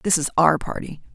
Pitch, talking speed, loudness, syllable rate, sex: 165 Hz, 210 wpm, -20 LUFS, 5.6 syllables/s, female